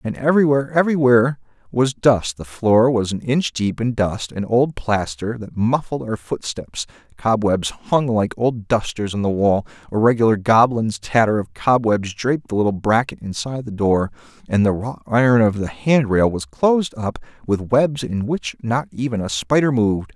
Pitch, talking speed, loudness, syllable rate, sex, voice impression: 115 Hz, 180 wpm, -19 LUFS, 4.9 syllables/s, male, very masculine, very adult-like, very middle-aged, very thick, tensed, very powerful, slightly dark, soft, clear, fluent, slightly raspy, cool, very intellectual, sincere, calm, friendly, very reassuring, unique, slightly elegant, slightly wild, slightly sweet, lively, kind, slightly modest